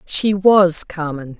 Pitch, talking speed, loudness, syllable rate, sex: 175 Hz, 130 wpm, -16 LUFS, 3.2 syllables/s, female